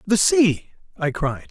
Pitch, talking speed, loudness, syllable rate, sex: 185 Hz, 160 wpm, -20 LUFS, 3.7 syllables/s, male